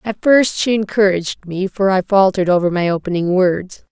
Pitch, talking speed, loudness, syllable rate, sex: 190 Hz, 185 wpm, -16 LUFS, 5.4 syllables/s, female